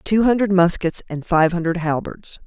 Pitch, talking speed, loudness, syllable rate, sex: 180 Hz, 170 wpm, -18 LUFS, 4.9 syllables/s, female